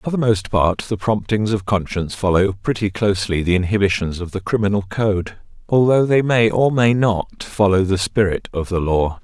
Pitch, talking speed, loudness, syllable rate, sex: 100 Hz, 190 wpm, -18 LUFS, 4.9 syllables/s, male